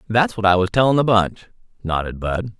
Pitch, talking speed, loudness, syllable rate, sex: 105 Hz, 210 wpm, -18 LUFS, 5.4 syllables/s, male